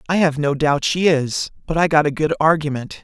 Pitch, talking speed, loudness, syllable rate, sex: 150 Hz, 235 wpm, -18 LUFS, 5.4 syllables/s, male